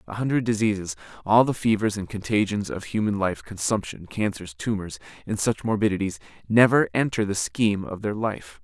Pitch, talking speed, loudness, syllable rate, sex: 105 Hz, 165 wpm, -24 LUFS, 5.4 syllables/s, male